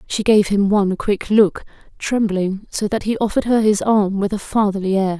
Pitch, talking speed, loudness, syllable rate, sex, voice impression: 205 Hz, 210 wpm, -18 LUFS, 5.1 syllables/s, female, very feminine, slightly young, adult-like, very thin, slightly tensed, weak, slightly bright, soft, muffled, very fluent, raspy, cute, very intellectual, refreshing, very sincere, slightly calm, friendly, reassuring, very unique, elegant, wild, sweet, lively, very kind, slightly intense, modest, light